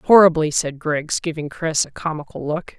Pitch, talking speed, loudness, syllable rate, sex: 160 Hz, 175 wpm, -20 LUFS, 4.7 syllables/s, female